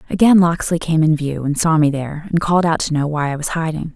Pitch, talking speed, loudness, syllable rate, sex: 160 Hz, 275 wpm, -17 LUFS, 6.2 syllables/s, female